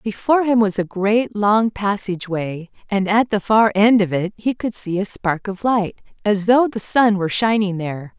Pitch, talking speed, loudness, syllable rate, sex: 205 Hz, 205 wpm, -18 LUFS, 4.7 syllables/s, female